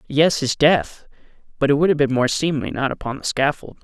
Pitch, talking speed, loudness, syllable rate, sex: 140 Hz, 220 wpm, -19 LUFS, 5.4 syllables/s, male